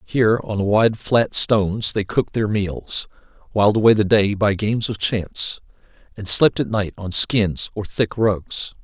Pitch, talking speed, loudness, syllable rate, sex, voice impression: 105 Hz, 175 wpm, -19 LUFS, 4.4 syllables/s, male, masculine, adult-like, tensed, powerful, hard, clear, raspy, calm, mature, reassuring, wild, lively, strict